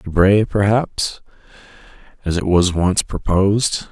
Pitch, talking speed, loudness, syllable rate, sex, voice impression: 95 Hz, 105 wpm, -17 LUFS, 3.9 syllables/s, male, very masculine, middle-aged, thick, cool, sincere, calm